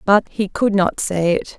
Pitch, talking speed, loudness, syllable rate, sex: 195 Hz, 225 wpm, -18 LUFS, 4.2 syllables/s, female